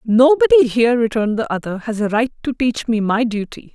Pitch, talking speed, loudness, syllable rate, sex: 235 Hz, 210 wpm, -17 LUFS, 5.7 syllables/s, female